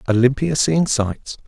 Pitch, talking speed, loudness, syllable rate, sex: 130 Hz, 120 wpm, -18 LUFS, 4.1 syllables/s, male